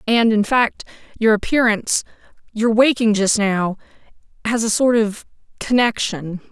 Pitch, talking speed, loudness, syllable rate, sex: 220 Hz, 130 wpm, -18 LUFS, 4.5 syllables/s, female